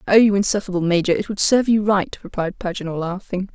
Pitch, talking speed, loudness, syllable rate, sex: 190 Hz, 205 wpm, -19 LUFS, 6.8 syllables/s, female